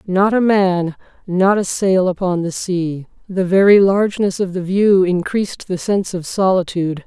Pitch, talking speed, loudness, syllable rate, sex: 185 Hz, 170 wpm, -16 LUFS, 4.7 syllables/s, female